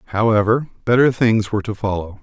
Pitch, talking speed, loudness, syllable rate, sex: 110 Hz, 160 wpm, -18 LUFS, 6.1 syllables/s, male